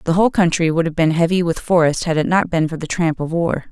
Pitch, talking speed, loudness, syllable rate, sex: 165 Hz, 290 wpm, -17 LUFS, 6.2 syllables/s, female